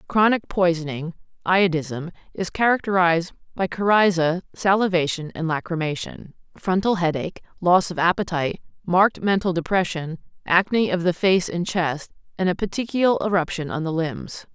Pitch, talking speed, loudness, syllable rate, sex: 175 Hz, 130 wpm, -22 LUFS, 5.1 syllables/s, female